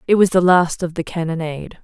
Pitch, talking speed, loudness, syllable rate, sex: 170 Hz, 230 wpm, -17 LUFS, 6.0 syllables/s, female